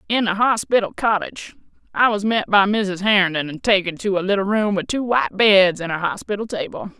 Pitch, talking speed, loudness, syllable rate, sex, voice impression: 200 Hz, 205 wpm, -19 LUFS, 5.6 syllables/s, female, feminine, adult-like, slightly clear, intellectual